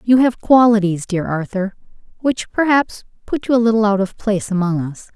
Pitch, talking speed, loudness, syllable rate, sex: 210 Hz, 185 wpm, -17 LUFS, 5.3 syllables/s, female